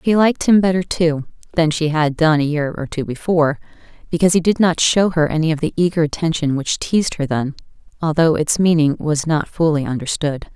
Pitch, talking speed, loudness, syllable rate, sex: 160 Hz, 205 wpm, -17 LUFS, 5.7 syllables/s, female